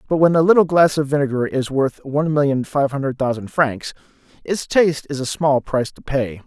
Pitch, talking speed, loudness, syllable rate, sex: 140 Hz, 215 wpm, -18 LUFS, 5.6 syllables/s, male